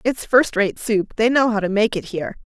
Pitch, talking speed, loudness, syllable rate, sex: 215 Hz, 260 wpm, -19 LUFS, 5.3 syllables/s, female